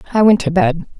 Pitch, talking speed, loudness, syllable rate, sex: 200 Hz, 240 wpm, -14 LUFS, 6.4 syllables/s, female